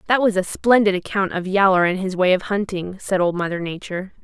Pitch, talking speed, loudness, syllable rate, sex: 190 Hz, 225 wpm, -20 LUFS, 5.8 syllables/s, female